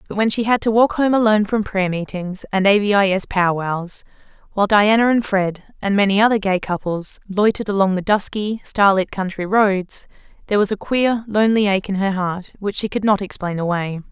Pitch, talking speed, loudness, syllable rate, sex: 200 Hz, 210 wpm, -18 LUFS, 5.4 syllables/s, female